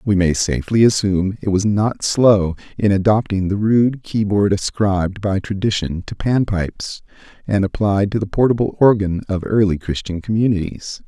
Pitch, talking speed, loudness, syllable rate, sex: 100 Hz, 155 wpm, -18 LUFS, 4.9 syllables/s, male